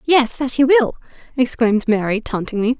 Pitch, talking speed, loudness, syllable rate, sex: 245 Hz, 150 wpm, -17 LUFS, 5.3 syllables/s, female